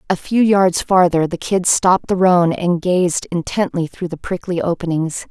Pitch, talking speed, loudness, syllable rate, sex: 180 Hz, 180 wpm, -17 LUFS, 4.5 syllables/s, female